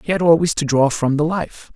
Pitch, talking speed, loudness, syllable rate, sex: 155 Hz, 275 wpm, -17 LUFS, 5.5 syllables/s, male